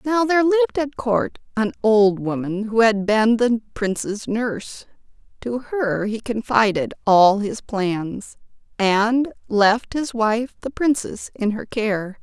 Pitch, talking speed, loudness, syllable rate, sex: 225 Hz, 145 wpm, -20 LUFS, 3.6 syllables/s, female